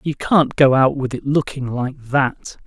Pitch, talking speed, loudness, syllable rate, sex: 135 Hz, 205 wpm, -18 LUFS, 4.0 syllables/s, male